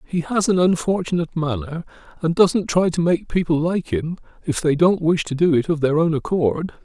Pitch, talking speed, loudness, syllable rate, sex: 165 Hz, 210 wpm, -20 LUFS, 5.2 syllables/s, male